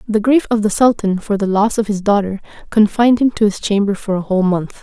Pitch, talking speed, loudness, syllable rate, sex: 210 Hz, 250 wpm, -15 LUFS, 6.0 syllables/s, female